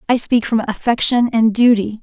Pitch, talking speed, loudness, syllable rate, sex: 230 Hz, 180 wpm, -15 LUFS, 5.0 syllables/s, female